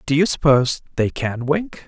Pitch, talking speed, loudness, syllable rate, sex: 145 Hz, 190 wpm, -19 LUFS, 4.9 syllables/s, male